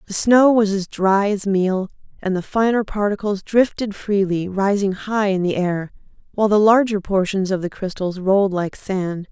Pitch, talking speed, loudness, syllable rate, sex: 200 Hz, 180 wpm, -19 LUFS, 4.6 syllables/s, female